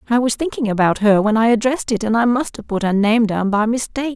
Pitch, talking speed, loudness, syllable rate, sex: 225 Hz, 275 wpm, -17 LUFS, 6.3 syllables/s, female